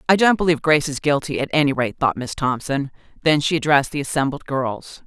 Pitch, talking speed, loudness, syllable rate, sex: 145 Hz, 215 wpm, -20 LUFS, 6.2 syllables/s, female